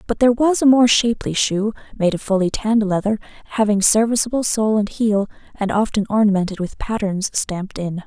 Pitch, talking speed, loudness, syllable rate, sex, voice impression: 210 Hz, 180 wpm, -18 LUFS, 5.7 syllables/s, female, very feminine, slightly young, slightly adult-like, thin, very relaxed, weak, bright, very soft, clear, very fluent, very cute, very intellectual, very refreshing, sincere, very calm, very friendly, very reassuring, very unique, very elegant, very sweet, very kind, very modest, light